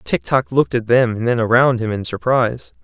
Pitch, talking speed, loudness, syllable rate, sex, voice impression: 115 Hz, 235 wpm, -17 LUFS, 5.7 syllables/s, male, very masculine, adult-like, slightly middle-aged, thick, tensed, slightly powerful, bright, soft, very clear, very fluent, very cool, intellectual, very refreshing, sincere, calm, mature, friendly, reassuring, unique, wild, sweet, very lively, kind, slightly light